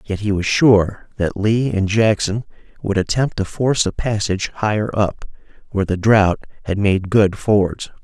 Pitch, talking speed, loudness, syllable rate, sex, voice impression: 105 Hz, 170 wpm, -18 LUFS, 4.5 syllables/s, male, masculine, adult-like, slightly dark, slightly sincere, calm, slightly kind